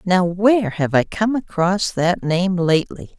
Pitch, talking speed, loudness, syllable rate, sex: 185 Hz, 170 wpm, -18 LUFS, 4.3 syllables/s, female